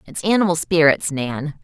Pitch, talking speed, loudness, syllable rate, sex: 155 Hz, 145 wpm, -18 LUFS, 4.7 syllables/s, female